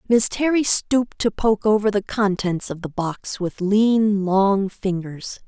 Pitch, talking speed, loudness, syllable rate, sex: 205 Hz, 165 wpm, -20 LUFS, 3.8 syllables/s, female